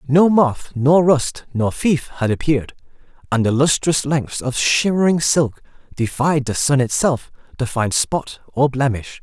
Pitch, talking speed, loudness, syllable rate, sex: 140 Hz, 155 wpm, -18 LUFS, 4.2 syllables/s, male